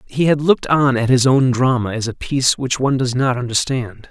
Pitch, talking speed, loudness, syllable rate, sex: 130 Hz, 235 wpm, -17 LUFS, 5.6 syllables/s, male